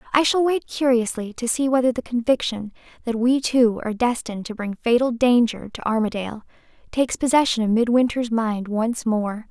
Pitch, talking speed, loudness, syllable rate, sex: 235 Hz, 170 wpm, -21 LUFS, 5.4 syllables/s, female